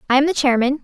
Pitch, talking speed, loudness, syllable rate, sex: 275 Hz, 285 wpm, -17 LUFS, 7.7 syllables/s, female